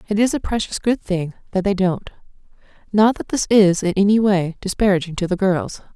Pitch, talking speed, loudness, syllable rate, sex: 195 Hz, 190 wpm, -19 LUFS, 5.4 syllables/s, female